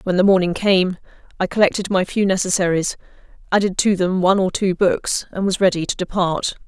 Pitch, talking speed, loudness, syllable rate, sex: 185 Hz, 190 wpm, -18 LUFS, 5.6 syllables/s, female